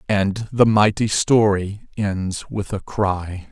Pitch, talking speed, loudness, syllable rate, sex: 100 Hz, 135 wpm, -20 LUFS, 3.2 syllables/s, male